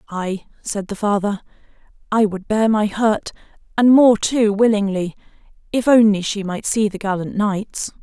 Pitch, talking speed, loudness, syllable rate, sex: 210 Hz, 155 wpm, -18 LUFS, 4.4 syllables/s, female